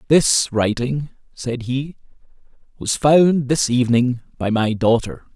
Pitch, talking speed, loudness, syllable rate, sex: 130 Hz, 125 wpm, -18 LUFS, 3.9 syllables/s, male